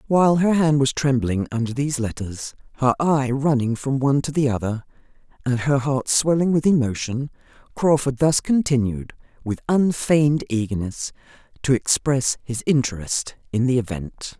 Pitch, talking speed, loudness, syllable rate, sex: 130 Hz, 145 wpm, -21 LUFS, 5.0 syllables/s, female